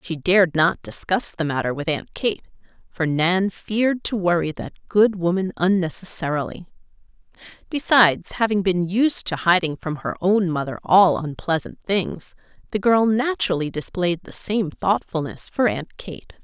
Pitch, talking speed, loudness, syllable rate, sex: 185 Hz, 150 wpm, -21 LUFS, 4.6 syllables/s, female